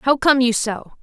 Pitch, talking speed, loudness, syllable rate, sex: 250 Hz, 235 wpm, -17 LUFS, 4.1 syllables/s, female